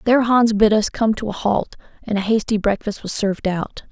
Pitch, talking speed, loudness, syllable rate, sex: 215 Hz, 230 wpm, -19 LUFS, 5.5 syllables/s, female